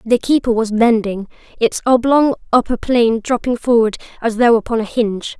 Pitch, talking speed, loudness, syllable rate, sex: 235 Hz, 165 wpm, -15 LUFS, 5.3 syllables/s, female